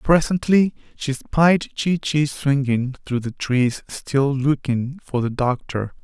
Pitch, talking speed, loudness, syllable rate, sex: 140 Hz, 140 wpm, -21 LUFS, 3.5 syllables/s, male